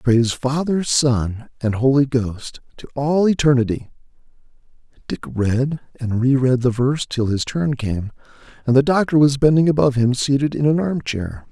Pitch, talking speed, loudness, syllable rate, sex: 130 Hz, 165 wpm, -18 LUFS, 4.8 syllables/s, male